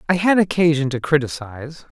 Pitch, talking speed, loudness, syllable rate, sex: 150 Hz, 150 wpm, -18 LUFS, 5.9 syllables/s, male